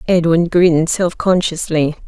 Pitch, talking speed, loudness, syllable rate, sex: 170 Hz, 115 wpm, -15 LUFS, 4.4 syllables/s, female